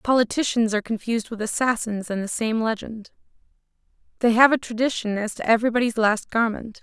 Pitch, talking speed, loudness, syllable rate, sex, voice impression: 225 Hz, 160 wpm, -22 LUFS, 5.9 syllables/s, female, feminine, adult-like, slightly clear, intellectual, slightly calm